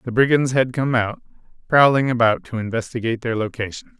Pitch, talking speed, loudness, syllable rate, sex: 120 Hz, 165 wpm, -19 LUFS, 6.0 syllables/s, male